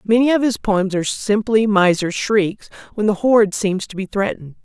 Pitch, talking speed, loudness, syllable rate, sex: 205 Hz, 195 wpm, -18 LUFS, 5.0 syllables/s, female